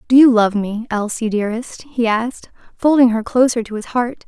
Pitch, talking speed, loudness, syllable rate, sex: 235 Hz, 195 wpm, -17 LUFS, 5.3 syllables/s, female